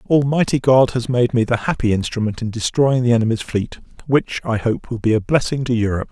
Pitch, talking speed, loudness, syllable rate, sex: 120 Hz, 215 wpm, -18 LUFS, 5.9 syllables/s, male